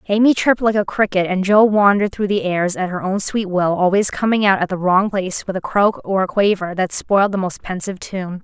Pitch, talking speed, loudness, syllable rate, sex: 195 Hz, 250 wpm, -17 LUFS, 5.7 syllables/s, female